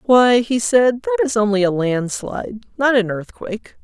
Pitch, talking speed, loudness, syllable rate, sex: 215 Hz, 170 wpm, -17 LUFS, 4.7 syllables/s, female